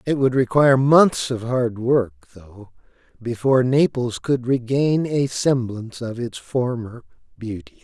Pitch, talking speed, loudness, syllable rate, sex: 125 Hz, 140 wpm, -20 LUFS, 4.2 syllables/s, male